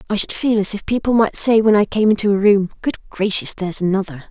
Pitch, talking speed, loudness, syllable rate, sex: 205 Hz, 250 wpm, -17 LUFS, 6.0 syllables/s, female